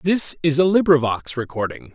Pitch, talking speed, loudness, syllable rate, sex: 145 Hz, 155 wpm, -19 LUFS, 5.1 syllables/s, male